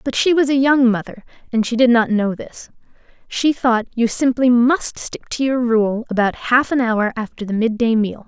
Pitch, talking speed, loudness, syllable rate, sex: 240 Hz, 220 wpm, -17 LUFS, 4.7 syllables/s, female